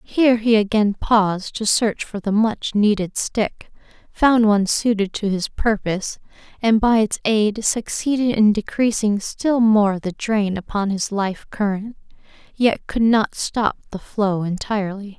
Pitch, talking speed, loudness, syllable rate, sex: 210 Hz, 155 wpm, -19 LUFS, 4.2 syllables/s, female